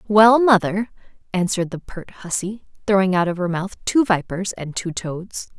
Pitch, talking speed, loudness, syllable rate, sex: 190 Hz, 170 wpm, -20 LUFS, 4.7 syllables/s, female